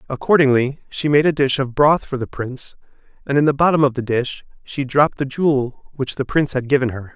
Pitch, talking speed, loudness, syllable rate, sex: 135 Hz, 225 wpm, -18 LUFS, 5.9 syllables/s, male